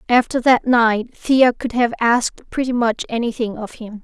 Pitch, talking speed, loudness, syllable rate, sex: 235 Hz, 180 wpm, -18 LUFS, 4.6 syllables/s, female